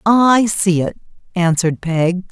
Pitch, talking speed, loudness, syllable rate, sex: 185 Hz, 130 wpm, -16 LUFS, 4.0 syllables/s, female